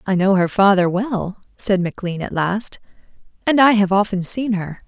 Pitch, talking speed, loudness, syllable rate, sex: 200 Hz, 185 wpm, -18 LUFS, 4.9 syllables/s, female